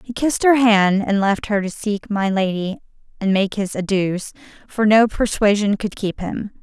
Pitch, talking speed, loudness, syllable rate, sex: 205 Hz, 190 wpm, -19 LUFS, 4.5 syllables/s, female